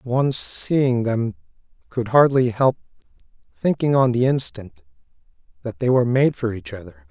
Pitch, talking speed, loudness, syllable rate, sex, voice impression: 125 Hz, 145 wpm, -20 LUFS, 4.8 syllables/s, male, masculine, middle-aged, slightly relaxed, powerful, hard, clear, raspy, cool, mature, friendly, wild, lively, strict, intense, slightly sharp